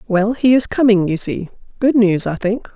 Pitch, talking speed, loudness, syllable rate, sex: 210 Hz, 220 wpm, -16 LUFS, 4.9 syllables/s, female